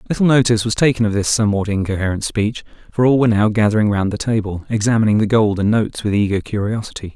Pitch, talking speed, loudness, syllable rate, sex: 105 Hz, 210 wpm, -17 LUFS, 6.9 syllables/s, male